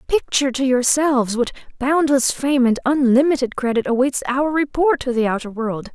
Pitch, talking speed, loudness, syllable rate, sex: 265 Hz, 160 wpm, -18 LUFS, 5.2 syllables/s, female